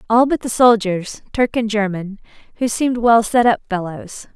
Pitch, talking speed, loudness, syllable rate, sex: 220 Hz, 165 wpm, -17 LUFS, 4.8 syllables/s, female